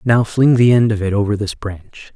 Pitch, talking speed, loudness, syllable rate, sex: 110 Hz, 250 wpm, -15 LUFS, 4.9 syllables/s, male